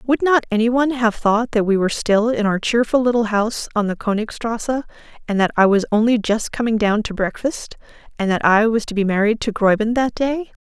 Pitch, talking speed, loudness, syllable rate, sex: 225 Hz, 220 wpm, -18 LUFS, 5.7 syllables/s, female